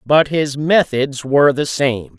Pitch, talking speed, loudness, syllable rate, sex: 140 Hz, 165 wpm, -16 LUFS, 3.9 syllables/s, male